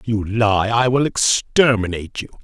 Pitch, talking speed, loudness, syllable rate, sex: 110 Hz, 170 wpm, -17 LUFS, 4.6 syllables/s, male